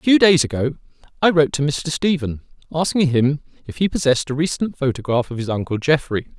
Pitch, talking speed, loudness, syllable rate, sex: 145 Hz, 195 wpm, -19 LUFS, 6.0 syllables/s, male